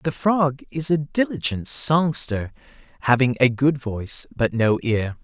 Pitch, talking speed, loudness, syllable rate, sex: 130 Hz, 150 wpm, -21 LUFS, 4.0 syllables/s, male